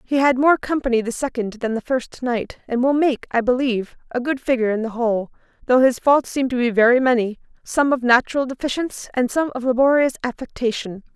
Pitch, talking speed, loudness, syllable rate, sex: 250 Hz, 205 wpm, -20 LUFS, 5.8 syllables/s, female